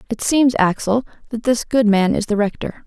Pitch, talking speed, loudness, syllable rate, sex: 225 Hz, 210 wpm, -18 LUFS, 5.1 syllables/s, female